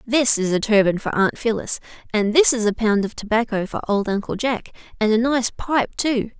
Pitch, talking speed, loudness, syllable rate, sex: 225 Hz, 215 wpm, -20 LUFS, 5.1 syllables/s, female